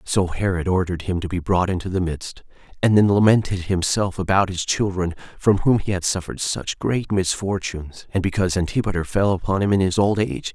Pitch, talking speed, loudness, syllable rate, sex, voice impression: 95 Hz, 200 wpm, -21 LUFS, 5.7 syllables/s, male, very masculine, very middle-aged, very thick, slightly relaxed, very powerful, dark, slightly soft, muffled, slightly fluent, cool, slightly intellectual, slightly refreshing, sincere, very calm, mature, very friendly, reassuring, slightly unique, slightly elegant, wild, sweet, lively, kind, modest